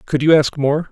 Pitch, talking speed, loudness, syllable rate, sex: 150 Hz, 265 wpm, -15 LUFS, 5.1 syllables/s, male